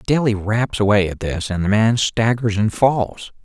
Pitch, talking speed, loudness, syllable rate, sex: 110 Hz, 190 wpm, -18 LUFS, 4.4 syllables/s, male